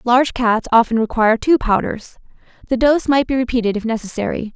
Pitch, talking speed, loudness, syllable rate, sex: 235 Hz, 170 wpm, -17 LUFS, 5.9 syllables/s, female